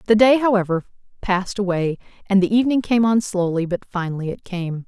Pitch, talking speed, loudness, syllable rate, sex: 200 Hz, 185 wpm, -20 LUFS, 6.0 syllables/s, female